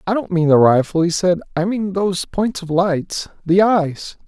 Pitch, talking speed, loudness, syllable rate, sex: 180 Hz, 195 wpm, -17 LUFS, 4.5 syllables/s, male